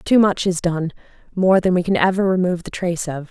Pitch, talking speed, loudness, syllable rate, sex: 180 Hz, 220 wpm, -19 LUFS, 6.4 syllables/s, female